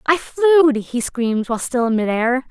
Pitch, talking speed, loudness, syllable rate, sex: 260 Hz, 190 wpm, -18 LUFS, 5.2 syllables/s, female